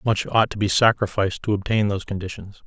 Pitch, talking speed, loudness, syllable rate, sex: 100 Hz, 205 wpm, -21 LUFS, 6.2 syllables/s, male